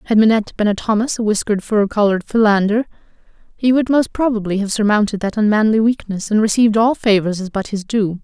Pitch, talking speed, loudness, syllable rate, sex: 215 Hz, 195 wpm, -16 LUFS, 6.3 syllables/s, female